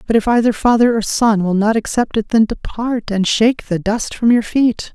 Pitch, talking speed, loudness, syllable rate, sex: 225 Hz, 230 wpm, -15 LUFS, 5.0 syllables/s, female